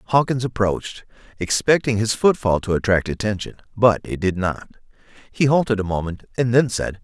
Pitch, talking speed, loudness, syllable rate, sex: 110 Hz, 160 wpm, -20 LUFS, 5.2 syllables/s, male